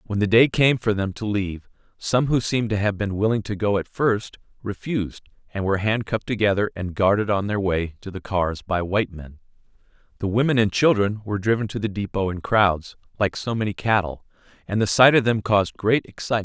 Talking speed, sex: 225 wpm, male